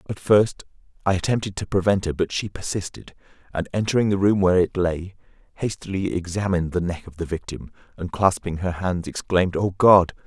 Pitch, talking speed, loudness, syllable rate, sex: 95 Hz, 180 wpm, -22 LUFS, 5.7 syllables/s, male